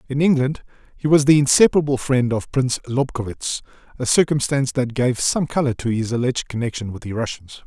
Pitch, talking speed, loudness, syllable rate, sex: 130 Hz, 170 wpm, -20 LUFS, 5.9 syllables/s, male